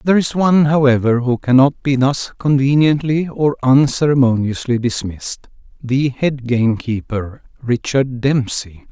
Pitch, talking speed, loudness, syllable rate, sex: 130 Hz, 110 wpm, -16 LUFS, 4.5 syllables/s, male